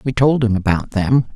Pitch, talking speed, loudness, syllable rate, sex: 115 Hz, 220 wpm, -17 LUFS, 5.0 syllables/s, male